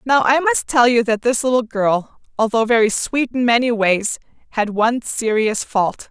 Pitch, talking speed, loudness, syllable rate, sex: 235 Hz, 185 wpm, -17 LUFS, 4.7 syllables/s, female